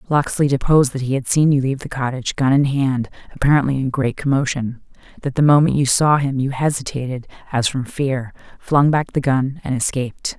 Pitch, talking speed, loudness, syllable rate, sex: 135 Hz, 195 wpm, -18 LUFS, 5.6 syllables/s, female